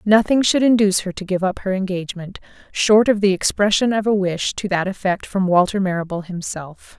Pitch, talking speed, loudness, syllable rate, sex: 195 Hz, 190 wpm, -18 LUFS, 5.5 syllables/s, female